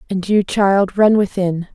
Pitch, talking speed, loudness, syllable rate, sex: 195 Hz, 170 wpm, -16 LUFS, 4.0 syllables/s, female